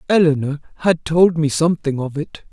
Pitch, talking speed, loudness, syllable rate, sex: 155 Hz, 165 wpm, -18 LUFS, 5.3 syllables/s, female